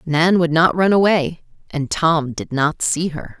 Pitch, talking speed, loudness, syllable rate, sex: 160 Hz, 195 wpm, -17 LUFS, 4.0 syllables/s, female